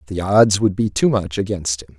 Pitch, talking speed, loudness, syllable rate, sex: 95 Hz, 240 wpm, -18 LUFS, 5.0 syllables/s, male